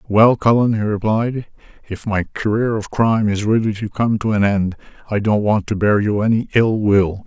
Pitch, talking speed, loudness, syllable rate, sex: 105 Hz, 205 wpm, -17 LUFS, 4.9 syllables/s, male